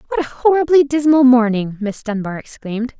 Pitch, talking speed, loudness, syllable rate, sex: 245 Hz, 160 wpm, -15 LUFS, 5.5 syllables/s, female